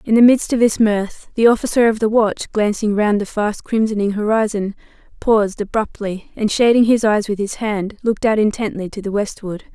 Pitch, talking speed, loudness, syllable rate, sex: 215 Hz, 195 wpm, -17 LUFS, 5.3 syllables/s, female